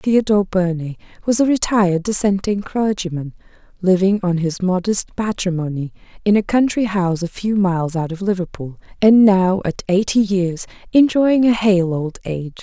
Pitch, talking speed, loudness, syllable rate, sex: 190 Hz, 150 wpm, -18 LUFS, 5.0 syllables/s, female